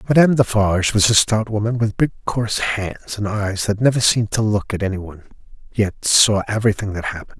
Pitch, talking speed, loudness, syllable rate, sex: 105 Hz, 205 wpm, -18 LUFS, 6.0 syllables/s, male